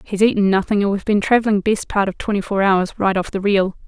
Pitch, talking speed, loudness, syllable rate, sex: 200 Hz, 265 wpm, -18 LUFS, 6.3 syllables/s, female